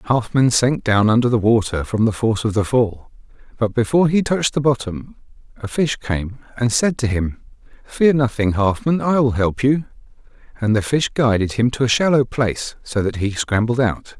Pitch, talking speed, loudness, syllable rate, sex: 120 Hz, 195 wpm, -18 LUFS, 5.1 syllables/s, male